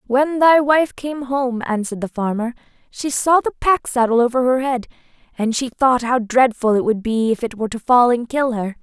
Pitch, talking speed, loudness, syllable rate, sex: 250 Hz, 220 wpm, -18 LUFS, 5.0 syllables/s, female